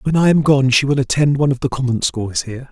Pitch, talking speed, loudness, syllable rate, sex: 135 Hz, 285 wpm, -16 LUFS, 6.5 syllables/s, male